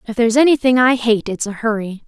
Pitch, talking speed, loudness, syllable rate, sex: 230 Hz, 230 wpm, -16 LUFS, 6.3 syllables/s, female